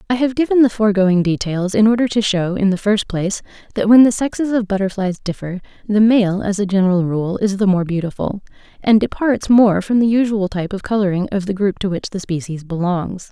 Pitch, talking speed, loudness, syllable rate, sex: 200 Hz, 215 wpm, -17 LUFS, 5.7 syllables/s, female